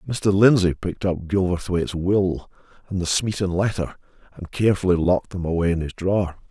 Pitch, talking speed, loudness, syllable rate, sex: 95 Hz, 165 wpm, -22 LUFS, 5.7 syllables/s, male